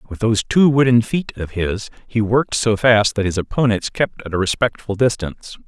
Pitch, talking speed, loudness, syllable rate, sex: 110 Hz, 200 wpm, -18 LUFS, 5.4 syllables/s, male